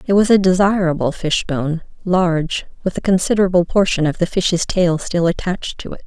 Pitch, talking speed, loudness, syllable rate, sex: 180 Hz, 180 wpm, -17 LUFS, 5.6 syllables/s, female